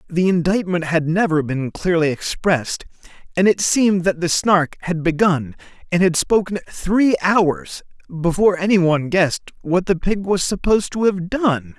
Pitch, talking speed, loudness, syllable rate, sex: 180 Hz, 165 wpm, -18 LUFS, 4.8 syllables/s, male